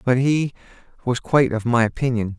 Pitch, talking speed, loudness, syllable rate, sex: 125 Hz, 175 wpm, -20 LUFS, 5.6 syllables/s, male